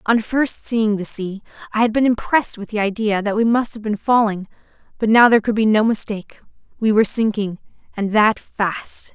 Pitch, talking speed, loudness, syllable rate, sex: 215 Hz, 205 wpm, -18 LUFS, 5.3 syllables/s, female